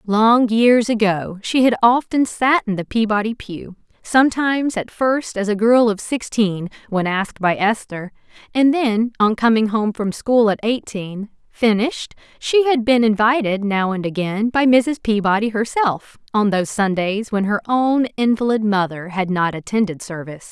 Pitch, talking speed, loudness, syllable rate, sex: 220 Hz, 165 wpm, -18 LUFS, 4.6 syllables/s, female